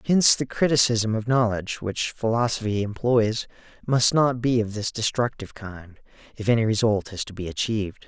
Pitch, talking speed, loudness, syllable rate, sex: 110 Hz, 165 wpm, -23 LUFS, 5.3 syllables/s, male